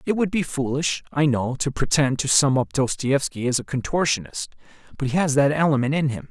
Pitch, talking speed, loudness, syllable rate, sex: 140 Hz, 210 wpm, -22 LUFS, 5.5 syllables/s, male